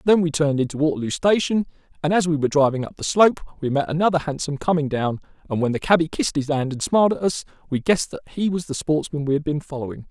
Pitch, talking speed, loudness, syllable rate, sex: 155 Hz, 250 wpm, -22 LUFS, 6.9 syllables/s, male